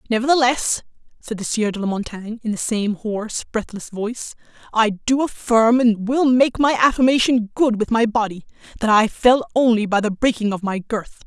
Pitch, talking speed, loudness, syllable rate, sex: 225 Hz, 185 wpm, -19 LUFS, 5.1 syllables/s, female